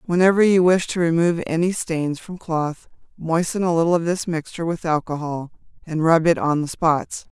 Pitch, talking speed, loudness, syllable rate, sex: 165 Hz, 185 wpm, -20 LUFS, 5.2 syllables/s, female